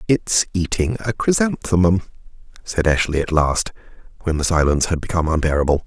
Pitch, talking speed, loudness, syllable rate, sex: 85 Hz, 145 wpm, -19 LUFS, 5.8 syllables/s, male